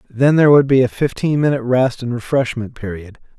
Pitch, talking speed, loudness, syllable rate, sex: 125 Hz, 195 wpm, -16 LUFS, 6.0 syllables/s, male